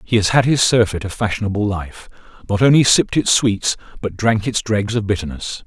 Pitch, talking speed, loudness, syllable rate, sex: 105 Hz, 200 wpm, -17 LUFS, 5.5 syllables/s, male